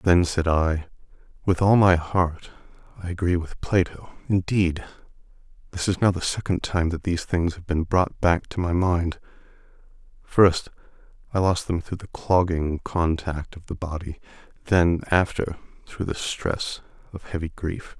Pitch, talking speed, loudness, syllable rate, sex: 85 Hz, 155 wpm, -24 LUFS, 4.4 syllables/s, male